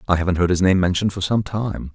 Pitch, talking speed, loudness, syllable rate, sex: 95 Hz, 280 wpm, -20 LUFS, 6.8 syllables/s, male